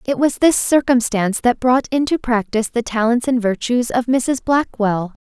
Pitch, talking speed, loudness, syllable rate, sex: 240 Hz, 170 wpm, -17 LUFS, 4.8 syllables/s, female